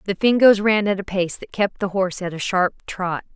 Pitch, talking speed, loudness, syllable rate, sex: 195 Hz, 250 wpm, -20 LUFS, 5.4 syllables/s, female